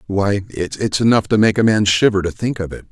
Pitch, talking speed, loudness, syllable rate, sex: 100 Hz, 245 wpm, -16 LUFS, 5.4 syllables/s, male